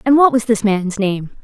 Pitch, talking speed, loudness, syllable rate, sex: 220 Hz, 250 wpm, -16 LUFS, 4.8 syllables/s, female